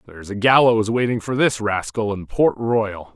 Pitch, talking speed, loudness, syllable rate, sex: 110 Hz, 190 wpm, -19 LUFS, 4.7 syllables/s, male